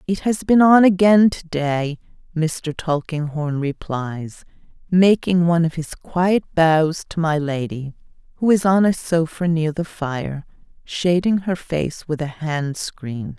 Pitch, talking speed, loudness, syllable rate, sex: 165 Hz, 150 wpm, -19 LUFS, 3.7 syllables/s, female